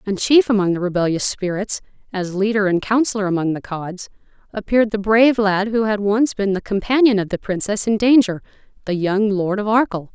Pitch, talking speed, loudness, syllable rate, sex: 205 Hz, 195 wpm, -18 LUFS, 5.5 syllables/s, female